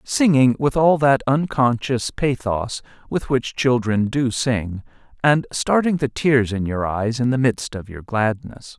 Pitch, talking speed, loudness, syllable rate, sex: 125 Hz, 165 wpm, -20 LUFS, 3.9 syllables/s, male